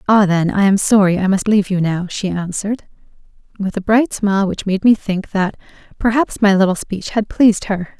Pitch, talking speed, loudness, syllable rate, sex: 200 Hz, 210 wpm, -16 LUFS, 5.5 syllables/s, female